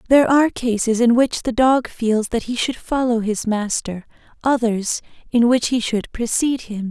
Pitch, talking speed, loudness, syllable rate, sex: 235 Hz, 180 wpm, -19 LUFS, 4.8 syllables/s, female